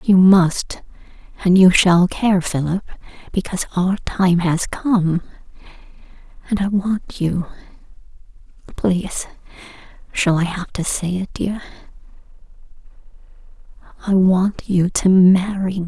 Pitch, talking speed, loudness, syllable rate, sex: 185 Hz, 105 wpm, -18 LUFS, 4.0 syllables/s, female